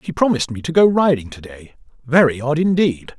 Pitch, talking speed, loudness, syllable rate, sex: 145 Hz, 205 wpm, -17 LUFS, 5.7 syllables/s, male